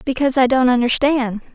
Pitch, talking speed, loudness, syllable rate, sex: 255 Hz, 155 wpm, -16 LUFS, 5.9 syllables/s, female